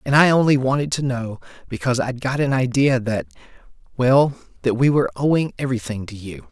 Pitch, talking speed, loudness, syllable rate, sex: 125 Hz, 165 wpm, -20 LUFS, 5.9 syllables/s, male